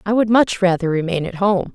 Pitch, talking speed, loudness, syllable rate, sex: 190 Hz, 240 wpm, -17 LUFS, 5.5 syllables/s, female